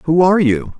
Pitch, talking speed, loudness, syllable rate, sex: 160 Hz, 225 wpm, -14 LUFS, 5.6 syllables/s, male